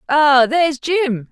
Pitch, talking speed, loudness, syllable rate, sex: 285 Hz, 135 wpm, -15 LUFS, 3.5 syllables/s, female